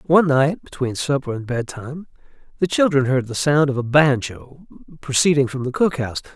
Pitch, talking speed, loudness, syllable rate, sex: 140 Hz, 180 wpm, -19 LUFS, 5.5 syllables/s, male